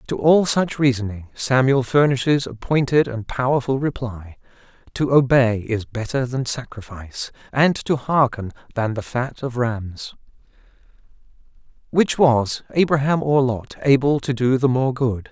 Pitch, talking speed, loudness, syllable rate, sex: 130 Hz, 135 wpm, -20 LUFS, 4.4 syllables/s, male